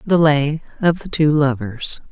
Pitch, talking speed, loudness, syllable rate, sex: 150 Hz, 170 wpm, -18 LUFS, 3.9 syllables/s, female